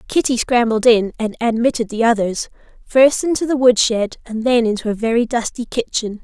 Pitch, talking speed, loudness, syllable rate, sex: 235 Hz, 185 wpm, -17 LUFS, 5.2 syllables/s, female